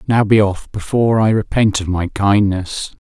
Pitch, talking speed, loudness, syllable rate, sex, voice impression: 105 Hz, 180 wpm, -16 LUFS, 4.6 syllables/s, male, very masculine, old, very thick, relaxed, powerful, dark, soft, clear, fluent, raspy, very cool, intellectual, slightly refreshing, sincere, calm, mature, slightly friendly, reassuring, unique, slightly elegant, wild, sweet, slightly lively, kind, modest